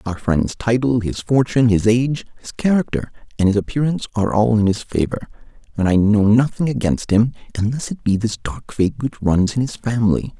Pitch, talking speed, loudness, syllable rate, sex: 115 Hz, 195 wpm, -18 LUFS, 5.6 syllables/s, male